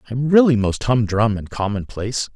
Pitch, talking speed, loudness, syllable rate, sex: 115 Hz, 155 wpm, -19 LUFS, 5.2 syllables/s, male